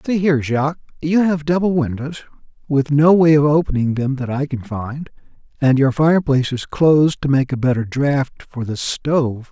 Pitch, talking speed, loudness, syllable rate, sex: 145 Hz, 190 wpm, -17 LUFS, 5.1 syllables/s, male